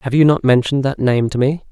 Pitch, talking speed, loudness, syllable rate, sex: 130 Hz, 280 wpm, -15 LUFS, 6.5 syllables/s, male